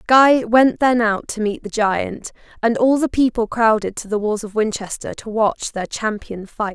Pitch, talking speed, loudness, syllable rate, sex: 225 Hz, 205 wpm, -18 LUFS, 4.4 syllables/s, female